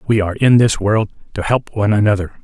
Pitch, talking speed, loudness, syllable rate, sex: 105 Hz, 220 wpm, -16 LUFS, 6.6 syllables/s, male